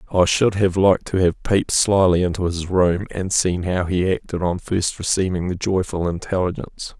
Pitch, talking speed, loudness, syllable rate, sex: 90 Hz, 190 wpm, -20 LUFS, 5.2 syllables/s, male